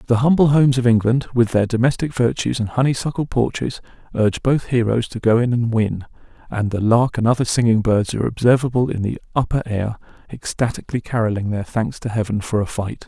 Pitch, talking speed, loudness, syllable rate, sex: 115 Hz, 195 wpm, -19 LUFS, 5.9 syllables/s, male